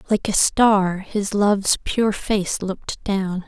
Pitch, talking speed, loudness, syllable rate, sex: 200 Hz, 155 wpm, -20 LUFS, 3.5 syllables/s, female